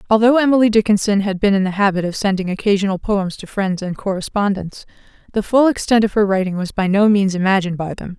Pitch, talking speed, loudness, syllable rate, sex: 200 Hz, 215 wpm, -17 LUFS, 6.3 syllables/s, female